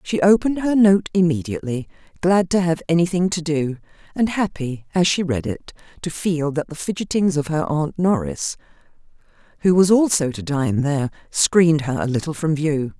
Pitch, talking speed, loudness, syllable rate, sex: 160 Hz, 175 wpm, -20 LUFS, 5.2 syllables/s, female